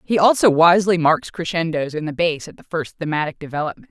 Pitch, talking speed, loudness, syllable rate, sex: 165 Hz, 200 wpm, -19 LUFS, 6.0 syllables/s, female